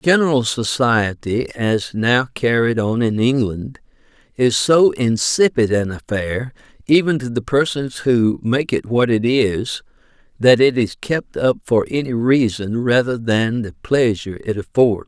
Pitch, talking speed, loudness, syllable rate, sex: 120 Hz, 145 wpm, -17 LUFS, 4.0 syllables/s, male